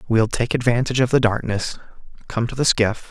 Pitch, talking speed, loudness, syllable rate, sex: 120 Hz, 195 wpm, -20 LUFS, 5.7 syllables/s, male